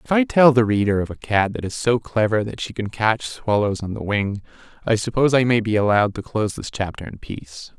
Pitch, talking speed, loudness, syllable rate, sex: 110 Hz, 245 wpm, -20 LUFS, 5.8 syllables/s, male